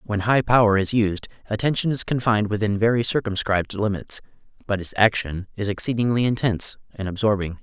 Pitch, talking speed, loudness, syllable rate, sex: 105 Hz, 155 wpm, -22 LUFS, 5.9 syllables/s, male